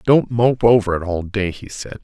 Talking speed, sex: 235 wpm, male